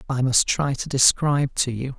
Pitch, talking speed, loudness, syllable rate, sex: 135 Hz, 210 wpm, -20 LUFS, 5.0 syllables/s, male